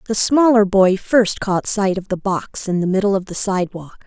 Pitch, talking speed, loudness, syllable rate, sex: 195 Hz, 220 wpm, -17 LUFS, 5.0 syllables/s, female